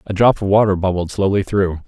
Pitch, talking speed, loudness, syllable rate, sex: 95 Hz, 225 wpm, -16 LUFS, 5.9 syllables/s, male